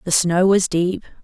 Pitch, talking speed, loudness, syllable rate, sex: 180 Hz, 195 wpm, -18 LUFS, 4.3 syllables/s, female